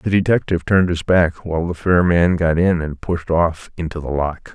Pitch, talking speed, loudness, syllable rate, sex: 85 Hz, 225 wpm, -18 LUFS, 5.2 syllables/s, male